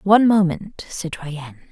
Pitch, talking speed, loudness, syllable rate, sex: 190 Hz, 105 wpm, -19 LUFS, 5.4 syllables/s, female